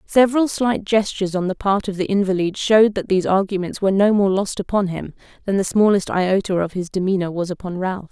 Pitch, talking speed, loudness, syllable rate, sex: 195 Hz, 215 wpm, -19 LUFS, 6.1 syllables/s, female